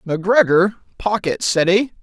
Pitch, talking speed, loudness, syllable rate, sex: 190 Hz, 90 wpm, -17 LUFS, 5.0 syllables/s, male